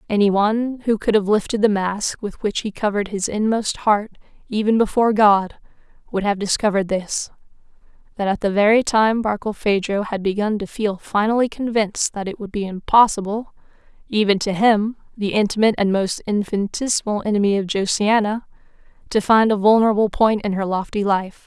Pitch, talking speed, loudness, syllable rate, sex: 210 Hz, 160 wpm, -19 LUFS, 5.5 syllables/s, female